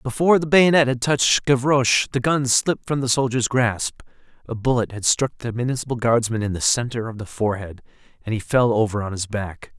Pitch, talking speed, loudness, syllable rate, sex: 120 Hz, 200 wpm, -20 LUFS, 5.8 syllables/s, male